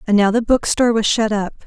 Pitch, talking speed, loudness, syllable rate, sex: 215 Hz, 250 wpm, -16 LUFS, 6.3 syllables/s, female